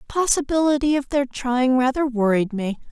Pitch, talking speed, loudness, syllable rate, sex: 260 Hz, 165 wpm, -20 LUFS, 5.6 syllables/s, female